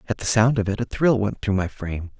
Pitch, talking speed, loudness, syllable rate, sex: 105 Hz, 300 wpm, -22 LUFS, 6.1 syllables/s, male